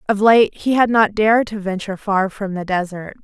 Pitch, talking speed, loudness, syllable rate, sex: 205 Hz, 220 wpm, -17 LUFS, 5.3 syllables/s, female